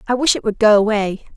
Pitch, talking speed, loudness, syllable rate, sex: 215 Hz, 265 wpm, -16 LUFS, 6.3 syllables/s, female